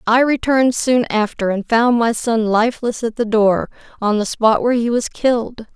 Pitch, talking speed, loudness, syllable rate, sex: 230 Hz, 200 wpm, -17 LUFS, 5.0 syllables/s, female